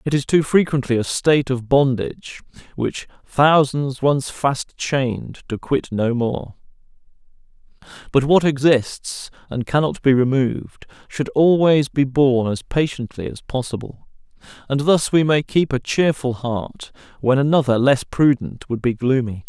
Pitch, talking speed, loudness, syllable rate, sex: 135 Hz, 145 wpm, -19 LUFS, 4.4 syllables/s, male